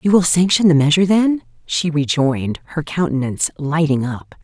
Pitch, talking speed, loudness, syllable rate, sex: 155 Hz, 160 wpm, -17 LUFS, 5.5 syllables/s, female